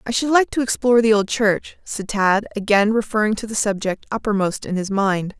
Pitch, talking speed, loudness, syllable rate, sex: 210 Hz, 210 wpm, -19 LUFS, 5.3 syllables/s, female